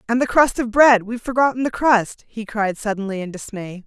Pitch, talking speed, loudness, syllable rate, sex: 225 Hz, 215 wpm, -18 LUFS, 5.5 syllables/s, female